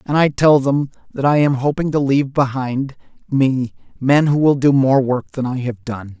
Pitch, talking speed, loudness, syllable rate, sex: 135 Hz, 215 wpm, -17 LUFS, 4.7 syllables/s, male